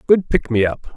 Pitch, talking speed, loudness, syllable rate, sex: 140 Hz, 250 wpm, -18 LUFS, 5.0 syllables/s, male